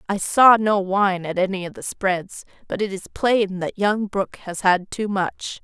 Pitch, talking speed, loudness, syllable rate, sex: 195 Hz, 215 wpm, -21 LUFS, 4.3 syllables/s, female